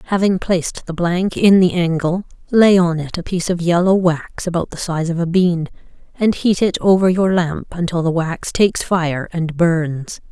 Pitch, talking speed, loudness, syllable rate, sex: 175 Hz, 200 wpm, -17 LUFS, 4.6 syllables/s, female